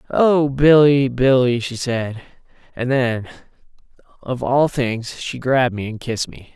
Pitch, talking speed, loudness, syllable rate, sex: 125 Hz, 145 wpm, -18 LUFS, 4.1 syllables/s, male